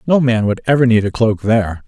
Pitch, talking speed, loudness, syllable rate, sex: 115 Hz, 255 wpm, -15 LUFS, 6.0 syllables/s, male